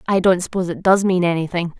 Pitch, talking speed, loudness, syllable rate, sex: 180 Hz, 235 wpm, -18 LUFS, 6.8 syllables/s, female